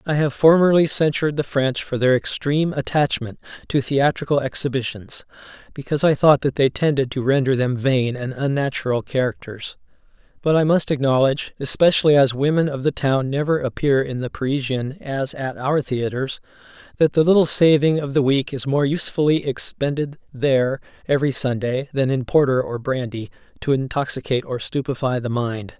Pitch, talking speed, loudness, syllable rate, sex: 135 Hz, 165 wpm, -20 LUFS, 5.4 syllables/s, male